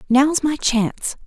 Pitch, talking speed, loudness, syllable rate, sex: 265 Hz, 140 wpm, -19 LUFS, 4.0 syllables/s, female